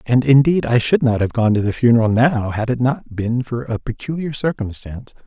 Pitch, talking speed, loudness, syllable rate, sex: 120 Hz, 215 wpm, -17 LUFS, 5.3 syllables/s, male